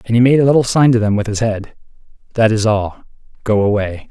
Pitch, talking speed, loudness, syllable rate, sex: 110 Hz, 235 wpm, -14 LUFS, 6.0 syllables/s, male